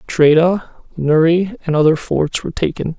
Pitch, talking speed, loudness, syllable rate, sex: 165 Hz, 140 wpm, -15 LUFS, 5.0 syllables/s, male